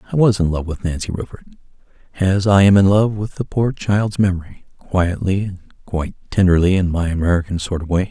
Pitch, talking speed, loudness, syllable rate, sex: 95 Hz, 200 wpm, -18 LUFS, 5.6 syllables/s, male